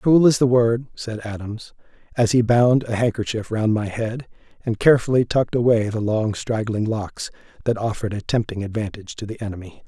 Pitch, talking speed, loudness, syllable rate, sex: 110 Hz, 180 wpm, -21 LUFS, 5.5 syllables/s, male